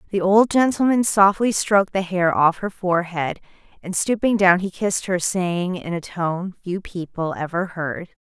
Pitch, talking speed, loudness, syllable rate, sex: 185 Hz, 175 wpm, -20 LUFS, 4.6 syllables/s, female